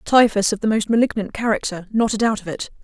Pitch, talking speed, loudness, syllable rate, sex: 215 Hz, 210 wpm, -19 LUFS, 6.1 syllables/s, female